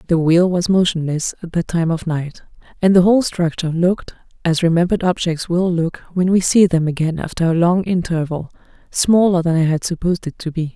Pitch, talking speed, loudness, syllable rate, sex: 170 Hz, 190 wpm, -17 LUFS, 5.7 syllables/s, female